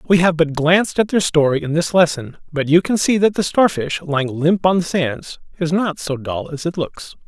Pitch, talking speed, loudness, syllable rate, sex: 165 Hz, 240 wpm, -17 LUFS, 5.1 syllables/s, male